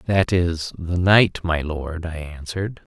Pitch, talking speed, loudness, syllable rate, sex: 85 Hz, 165 wpm, -21 LUFS, 3.8 syllables/s, male